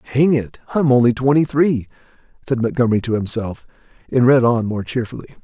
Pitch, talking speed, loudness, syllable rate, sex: 125 Hz, 165 wpm, -17 LUFS, 5.8 syllables/s, male